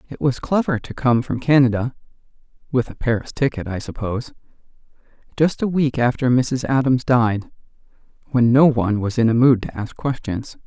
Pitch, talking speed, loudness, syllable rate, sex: 125 Hz, 170 wpm, -19 LUFS, 4.4 syllables/s, male